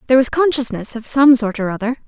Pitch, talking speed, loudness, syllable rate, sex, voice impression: 245 Hz, 230 wpm, -16 LUFS, 6.6 syllables/s, female, feminine, adult-like, tensed, bright, fluent, slightly intellectual, friendly, slightly reassuring, elegant, kind